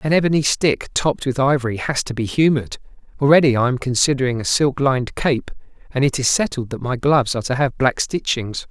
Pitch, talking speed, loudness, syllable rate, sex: 135 Hz, 205 wpm, -19 LUFS, 6.0 syllables/s, male